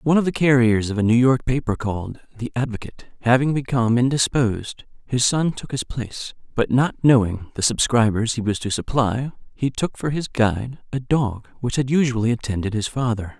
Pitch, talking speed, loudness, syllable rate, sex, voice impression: 120 Hz, 190 wpm, -21 LUFS, 5.5 syllables/s, male, masculine, very adult-like, slightly thick, slightly muffled, cool, sincere, calm, slightly kind